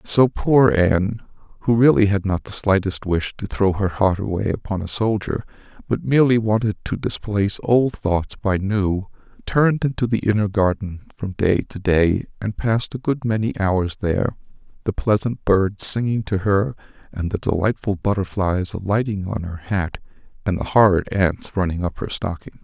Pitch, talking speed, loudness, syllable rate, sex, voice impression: 100 Hz, 170 wpm, -20 LUFS, 4.8 syllables/s, male, very masculine, very adult-like, very old, very relaxed, weak, slightly bright, very soft, very muffled, slightly halting, raspy, very cool, intellectual, sincere, very calm, very mature, very friendly, reassuring, very unique, very elegant, wild, sweet, lively, very kind, modest, slightly light